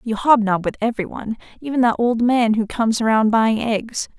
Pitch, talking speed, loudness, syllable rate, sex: 225 Hz, 185 wpm, -18 LUFS, 5.4 syllables/s, female